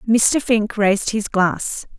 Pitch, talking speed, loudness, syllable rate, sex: 210 Hz, 150 wpm, -18 LUFS, 3.5 syllables/s, female